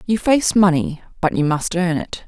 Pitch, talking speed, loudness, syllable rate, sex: 180 Hz, 210 wpm, -18 LUFS, 4.7 syllables/s, female